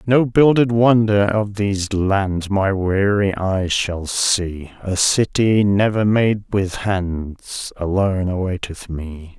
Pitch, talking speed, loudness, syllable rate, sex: 100 Hz, 130 wpm, -18 LUFS, 3.3 syllables/s, male